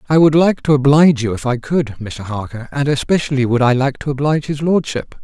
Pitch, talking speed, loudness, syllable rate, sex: 135 Hz, 230 wpm, -16 LUFS, 5.9 syllables/s, male